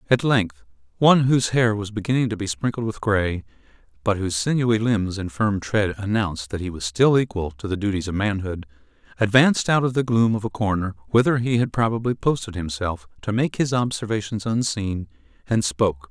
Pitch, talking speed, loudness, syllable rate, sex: 105 Hz, 190 wpm, -22 LUFS, 5.6 syllables/s, male